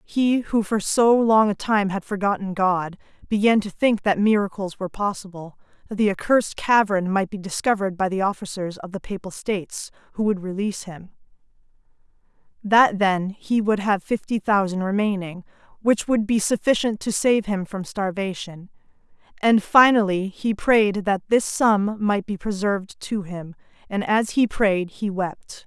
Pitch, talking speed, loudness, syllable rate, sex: 200 Hz, 160 wpm, -21 LUFS, 4.7 syllables/s, female